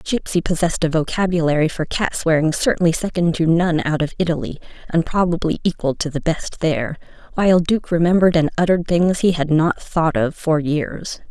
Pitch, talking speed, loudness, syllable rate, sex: 165 Hz, 180 wpm, -19 LUFS, 5.6 syllables/s, female